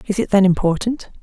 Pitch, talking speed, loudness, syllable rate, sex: 200 Hz, 195 wpm, -17 LUFS, 6.1 syllables/s, female